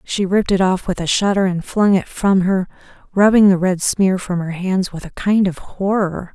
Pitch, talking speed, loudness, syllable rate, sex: 190 Hz, 225 wpm, -17 LUFS, 4.8 syllables/s, female